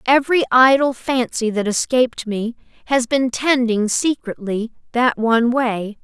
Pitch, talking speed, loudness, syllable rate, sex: 240 Hz, 130 wpm, -18 LUFS, 4.4 syllables/s, female